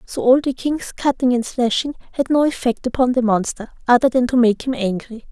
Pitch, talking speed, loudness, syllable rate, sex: 245 Hz, 215 wpm, -18 LUFS, 5.5 syllables/s, female